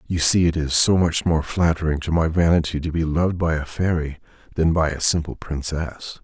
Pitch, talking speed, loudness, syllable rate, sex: 80 Hz, 210 wpm, -21 LUFS, 5.2 syllables/s, male